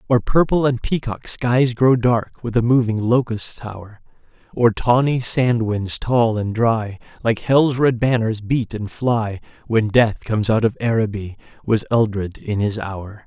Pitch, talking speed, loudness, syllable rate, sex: 115 Hz, 165 wpm, -19 LUFS, 4.2 syllables/s, male